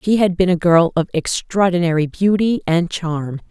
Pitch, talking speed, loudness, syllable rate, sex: 175 Hz, 170 wpm, -17 LUFS, 4.7 syllables/s, female